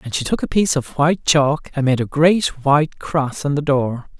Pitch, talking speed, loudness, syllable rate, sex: 145 Hz, 245 wpm, -18 LUFS, 5.0 syllables/s, male